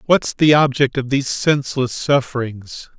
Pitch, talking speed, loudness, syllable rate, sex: 135 Hz, 140 wpm, -17 LUFS, 4.7 syllables/s, male